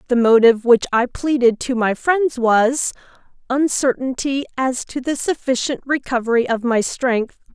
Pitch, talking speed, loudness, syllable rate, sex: 250 Hz, 135 wpm, -18 LUFS, 4.5 syllables/s, female